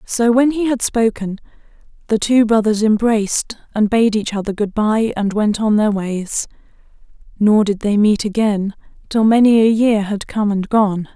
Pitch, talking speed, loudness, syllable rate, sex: 215 Hz, 175 wpm, -16 LUFS, 4.5 syllables/s, female